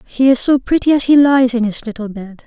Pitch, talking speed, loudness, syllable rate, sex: 250 Hz, 270 wpm, -13 LUFS, 5.6 syllables/s, female